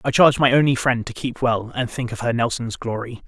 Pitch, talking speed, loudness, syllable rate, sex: 120 Hz, 255 wpm, -20 LUFS, 5.7 syllables/s, male